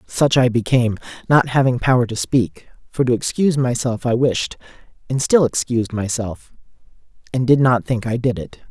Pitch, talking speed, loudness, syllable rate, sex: 125 Hz, 170 wpm, -18 LUFS, 5.2 syllables/s, male